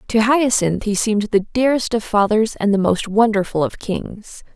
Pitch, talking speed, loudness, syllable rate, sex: 215 Hz, 185 wpm, -18 LUFS, 4.9 syllables/s, female